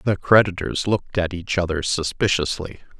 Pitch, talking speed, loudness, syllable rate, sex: 90 Hz, 140 wpm, -21 LUFS, 5.0 syllables/s, male